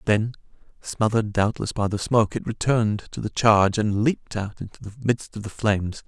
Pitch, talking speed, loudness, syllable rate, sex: 105 Hz, 200 wpm, -23 LUFS, 5.6 syllables/s, male